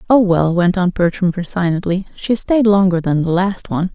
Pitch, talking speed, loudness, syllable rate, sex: 185 Hz, 200 wpm, -16 LUFS, 5.2 syllables/s, female